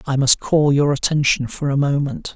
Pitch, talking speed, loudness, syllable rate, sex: 140 Hz, 205 wpm, -18 LUFS, 5.0 syllables/s, male